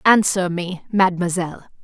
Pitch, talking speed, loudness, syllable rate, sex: 185 Hz, 100 wpm, -20 LUFS, 5.4 syllables/s, female